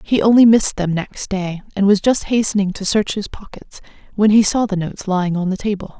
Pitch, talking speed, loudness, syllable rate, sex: 200 Hz, 230 wpm, -17 LUFS, 5.7 syllables/s, female